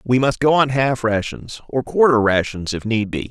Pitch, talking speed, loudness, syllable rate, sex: 120 Hz, 220 wpm, -18 LUFS, 4.8 syllables/s, male